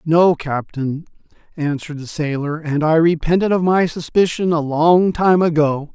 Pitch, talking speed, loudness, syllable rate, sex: 160 Hz, 150 wpm, -17 LUFS, 4.5 syllables/s, male